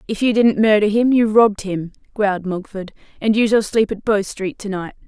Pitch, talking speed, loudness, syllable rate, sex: 210 Hz, 225 wpm, -18 LUFS, 5.4 syllables/s, female